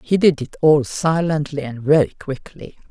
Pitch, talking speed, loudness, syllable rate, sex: 150 Hz, 165 wpm, -18 LUFS, 4.7 syllables/s, female